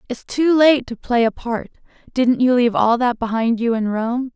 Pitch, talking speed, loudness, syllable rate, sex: 240 Hz, 220 wpm, -18 LUFS, 4.9 syllables/s, female